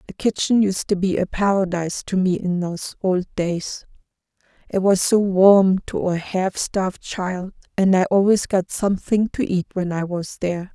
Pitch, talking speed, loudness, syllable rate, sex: 190 Hz, 180 wpm, -20 LUFS, 4.6 syllables/s, female